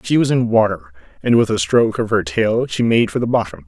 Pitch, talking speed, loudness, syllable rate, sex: 110 Hz, 260 wpm, -17 LUFS, 5.9 syllables/s, male